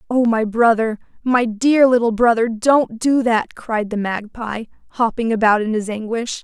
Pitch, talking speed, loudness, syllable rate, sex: 230 Hz, 170 wpm, -18 LUFS, 4.4 syllables/s, female